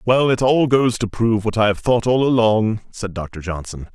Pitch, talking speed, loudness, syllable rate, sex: 110 Hz, 230 wpm, -18 LUFS, 5.1 syllables/s, male